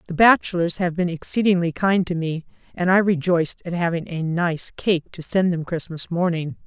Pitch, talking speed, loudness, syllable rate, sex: 175 Hz, 190 wpm, -21 LUFS, 5.2 syllables/s, female